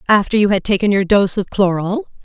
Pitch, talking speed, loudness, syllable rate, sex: 200 Hz, 215 wpm, -15 LUFS, 5.6 syllables/s, female